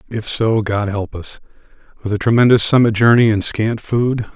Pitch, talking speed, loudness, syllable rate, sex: 110 Hz, 180 wpm, -15 LUFS, 5.0 syllables/s, male